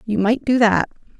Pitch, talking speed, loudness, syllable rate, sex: 220 Hz, 200 wpm, -18 LUFS, 4.8 syllables/s, female